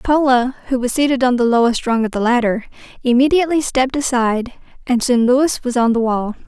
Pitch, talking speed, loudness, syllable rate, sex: 250 Hz, 195 wpm, -16 LUFS, 5.8 syllables/s, female